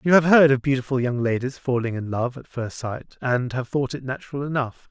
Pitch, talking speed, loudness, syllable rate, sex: 130 Hz, 230 wpm, -23 LUFS, 5.5 syllables/s, male